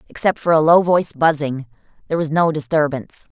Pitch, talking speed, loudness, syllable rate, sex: 155 Hz, 175 wpm, -17 LUFS, 6.3 syllables/s, female